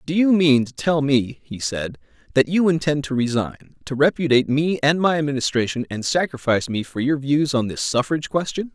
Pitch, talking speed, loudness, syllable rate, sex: 145 Hz, 200 wpm, -20 LUFS, 5.6 syllables/s, male